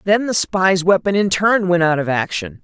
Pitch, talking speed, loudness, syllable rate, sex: 185 Hz, 230 wpm, -16 LUFS, 4.8 syllables/s, female